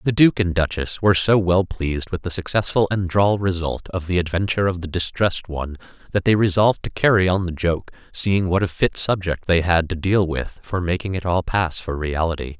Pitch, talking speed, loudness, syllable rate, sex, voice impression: 90 Hz, 220 wpm, -20 LUFS, 5.5 syllables/s, male, very masculine, very middle-aged, very thick, tensed, very powerful, bright, soft, muffled, fluent, very cool, very intellectual, very sincere, very calm, very mature, friendly, reassuring, very unique, slightly elegant, wild, sweet, very lively, very kind, slightly modest